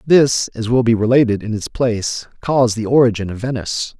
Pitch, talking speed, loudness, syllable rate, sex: 115 Hz, 195 wpm, -17 LUFS, 5.7 syllables/s, male